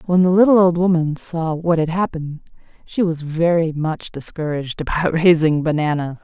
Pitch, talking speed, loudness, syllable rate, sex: 165 Hz, 165 wpm, -18 LUFS, 5.2 syllables/s, female